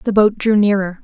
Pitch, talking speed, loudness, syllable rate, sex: 205 Hz, 230 wpm, -15 LUFS, 5.1 syllables/s, female